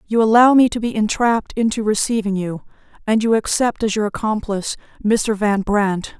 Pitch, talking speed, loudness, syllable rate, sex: 215 Hz, 175 wpm, -18 LUFS, 5.2 syllables/s, female